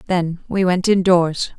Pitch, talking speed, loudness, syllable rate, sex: 180 Hz, 150 wpm, -17 LUFS, 3.9 syllables/s, female